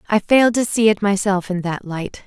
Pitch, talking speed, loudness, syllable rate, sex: 200 Hz, 240 wpm, -18 LUFS, 5.3 syllables/s, female